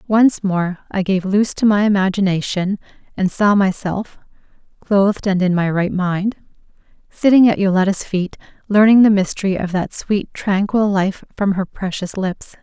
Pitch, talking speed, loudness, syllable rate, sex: 195 Hz, 155 wpm, -17 LUFS, 4.4 syllables/s, female